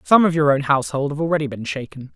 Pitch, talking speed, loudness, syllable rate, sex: 145 Hz, 250 wpm, -19 LUFS, 6.8 syllables/s, male